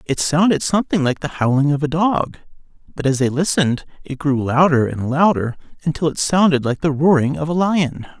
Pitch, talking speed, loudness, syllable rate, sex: 150 Hz, 200 wpm, -18 LUFS, 5.4 syllables/s, male